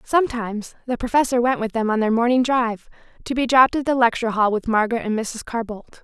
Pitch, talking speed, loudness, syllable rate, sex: 235 Hz, 230 wpm, -20 LUFS, 6.5 syllables/s, female